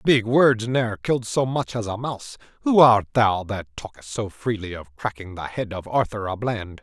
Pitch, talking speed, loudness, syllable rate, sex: 110 Hz, 210 wpm, -22 LUFS, 5.0 syllables/s, male